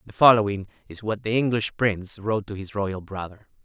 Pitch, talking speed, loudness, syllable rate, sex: 105 Hz, 200 wpm, -24 LUFS, 5.7 syllables/s, male